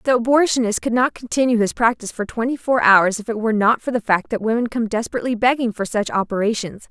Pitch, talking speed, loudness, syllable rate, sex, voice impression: 230 Hz, 225 wpm, -19 LUFS, 6.5 syllables/s, female, feminine, slightly adult-like, slightly clear, slightly cute, slightly calm, friendly